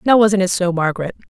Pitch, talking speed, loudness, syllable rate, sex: 190 Hz, 225 wpm, -16 LUFS, 6.4 syllables/s, female